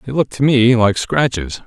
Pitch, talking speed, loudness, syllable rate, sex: 120 Hz, 215 wpm, -15 LUFS, 4.6 syllables/s, male